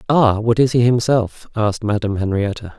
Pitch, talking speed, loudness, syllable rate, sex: 110 Hz, 170 wpm, -17 LUFS, 5.5 syllables/s, male